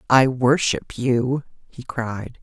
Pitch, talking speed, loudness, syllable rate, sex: 125 Hz, 125 wpm, -21 LUFS, 3.1 syllables/s, female